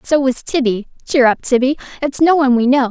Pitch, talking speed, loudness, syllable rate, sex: 265 Hz, 225 wpm, -15 LUFS, 5.5 syllables/s, female